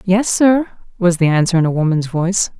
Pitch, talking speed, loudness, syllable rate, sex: 185 Hz, 210 wpm, -15 LUFS, 5.7 syllables/s, female